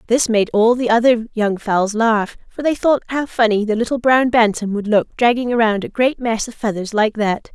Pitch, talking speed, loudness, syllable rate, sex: 225 Hz, 225 wpm, -17 LUFS, 4.9 syllables/s, female